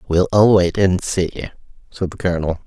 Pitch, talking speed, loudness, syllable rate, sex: 90 Hz, 180 wpm, -17 LUFS, 5.4 syllables/s, male